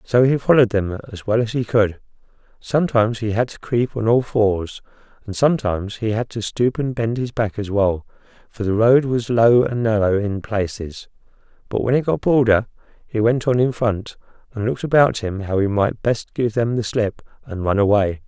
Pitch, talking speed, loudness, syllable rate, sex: 110 Hz, 205 wpm, -19 LUFS, 5.1 syllables/s, male